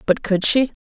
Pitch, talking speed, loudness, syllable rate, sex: 215 Hz, 215 wpm, -18 LUFS, 5.0 syllables/s, female